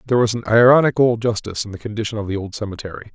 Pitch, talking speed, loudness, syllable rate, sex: 110 Hz, 230 wpm, -18 LUFS, 7.9 syllables/s, male